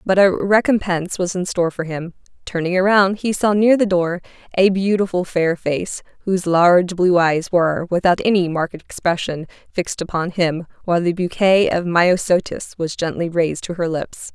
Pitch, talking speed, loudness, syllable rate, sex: 180 Hz, 175 wpm, -18 LUFS, 5.1 syllables/s, female